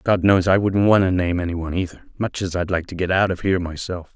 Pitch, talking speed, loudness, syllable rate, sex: 90 Hz, 290 wpm, -20 LUFS, 6.4 syllables/s, male